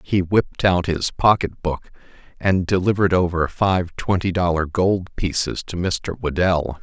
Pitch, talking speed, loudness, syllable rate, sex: 90 Hz, 150 wpm, -20 LUFS, 4.3 syllables/s, male